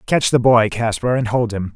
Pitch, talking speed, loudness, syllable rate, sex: 115 Hz, 240 wpm, -17 LUFS, 5.1 syllables/s, male